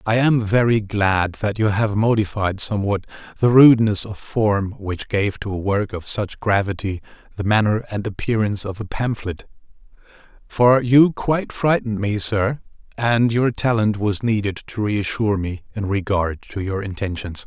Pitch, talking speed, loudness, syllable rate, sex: 105 Hz, 160 wpm, -20 LUFS, 4.7 syllables/s, male